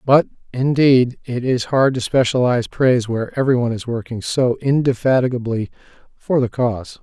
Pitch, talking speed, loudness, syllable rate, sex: 125 Hz, 145 wpm, -18 LUFS, 5.4 syllables/s, male